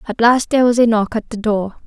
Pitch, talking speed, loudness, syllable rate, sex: 225 Hz, 290 wpm, -15 LUFS, 6.3 syllables/s, female